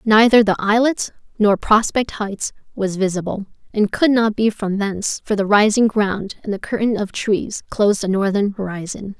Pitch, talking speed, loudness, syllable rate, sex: 210 Hz, 175 wpm, -18 LUFS, 4.8 syllables/s, female